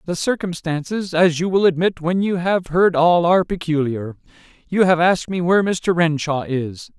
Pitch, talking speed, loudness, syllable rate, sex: 170 Hz, 180 wpm, -18 LUFS, 5.0 syllables/s, male